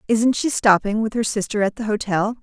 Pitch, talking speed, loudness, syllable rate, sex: 215 Hz, 225 wpm, -20 LUFS, 5.4 syllables/s, female